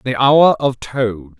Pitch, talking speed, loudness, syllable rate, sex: 125 Hz, 170 wpm, -15 LUFS, 3.4 syllables/s, male